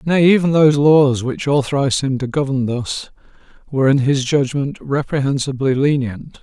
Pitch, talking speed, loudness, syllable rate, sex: 140 Hz, 150 wpm, -17 LUFS, 5.1 syllables/s, male